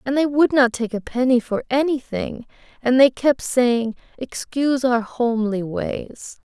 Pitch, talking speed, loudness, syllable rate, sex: 250 Hz, 155 wpm, -20 LUFS, 4.2 syllables/s, female